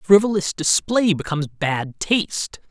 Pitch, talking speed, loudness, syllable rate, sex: 180 Hz, 110 wpm, -20 LUFS, 4.2 syllables/s, male